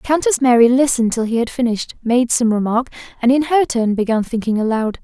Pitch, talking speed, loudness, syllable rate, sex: 240 Hz, 205 wpm, -16 LUFS, 5.9 syllables/s, female